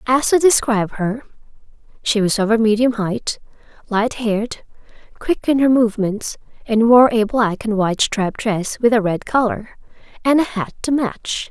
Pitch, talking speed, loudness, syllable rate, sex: 225 Hz, 160 wpm, -17 LUFS, 4.9 syllables/s, female